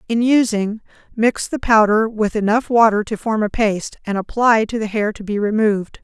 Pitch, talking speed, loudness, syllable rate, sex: 215 Hz, 200 wpm, -17 LUFS, 5.2 syllables/s, female